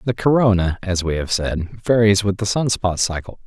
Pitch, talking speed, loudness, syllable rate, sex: 100 Hz, 210 wpm, -19 LUFS, 4.9 syllables/s, male